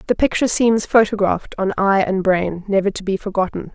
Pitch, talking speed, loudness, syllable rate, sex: 200 Hz, 190 wpm, -18 LUFS, 5.8 syllables/s, female